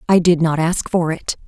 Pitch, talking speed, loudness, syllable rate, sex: 170 Hz, 245 wpm, -17 LUFS, 4.8 syllables/s, female